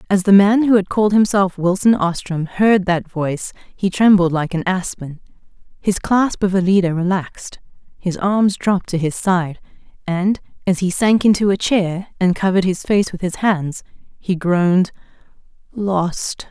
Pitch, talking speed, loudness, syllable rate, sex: 190 Hz, 165 wpm, -17 LUFS, 4.6 syllables/s, female